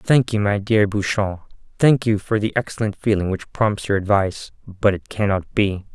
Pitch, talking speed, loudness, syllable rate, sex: 105 Hz, 190 wpm, -20 LUFS, 4.9 syllables/s, male